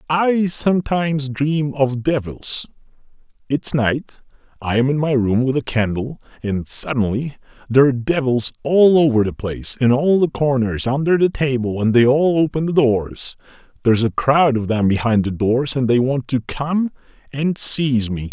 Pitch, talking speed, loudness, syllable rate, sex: 135 Hz, 170 wpm, -18 LUFS, 4.6 syllables/s, male